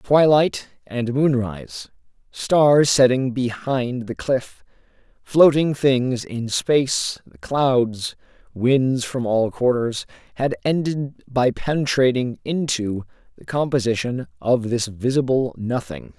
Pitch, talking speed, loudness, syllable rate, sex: 125 Hz, 105 wpm, -20 LUFS, 3.5 syllables/s, male